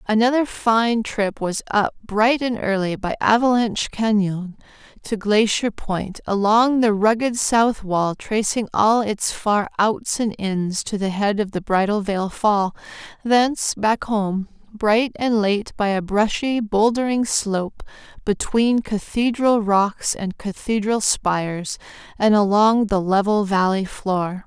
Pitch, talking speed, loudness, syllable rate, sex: 210 Hz, 140 wpm, -20 LUFS, 3.8 syllables/s, female